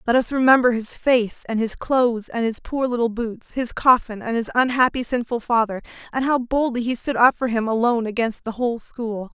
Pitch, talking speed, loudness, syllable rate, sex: 235 Hz, 210 wpm, -21 LUFS, 5.4 syllables/s, female